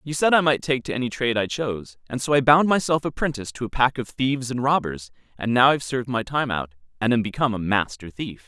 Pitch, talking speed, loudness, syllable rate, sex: 125 Hz, 255 wpm, -22 LUFS, 6.5 syllables/s, male